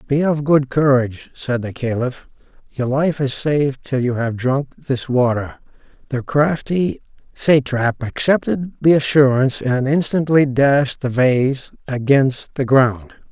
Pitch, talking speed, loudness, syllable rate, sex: 135 Hz, 140 wpm, -18 LUFS, 4.0 syllables/s, male